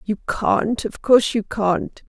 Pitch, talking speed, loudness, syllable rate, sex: 215 Hz, 170 wpm, -20 LUFS, 3.6 syllables/s, female